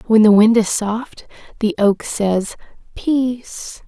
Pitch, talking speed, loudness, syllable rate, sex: 220 Hz, 140 wpm, -16 LUFS, 3.4 syllables/s, female